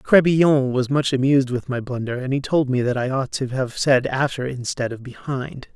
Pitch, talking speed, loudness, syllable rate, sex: 130 Hz, 220 wpm, -21 LUFS, 5.1 syllables/s, male